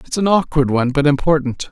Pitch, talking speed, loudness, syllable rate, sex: 145 Hz, 210 wpm, -16 LUFS, 6.4 syllables/s, male